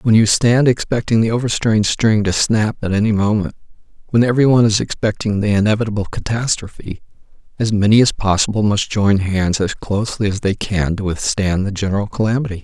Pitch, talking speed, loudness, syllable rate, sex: 105 Hz, 170 wpm, -16 LUFS, 5.8 syllables/s, male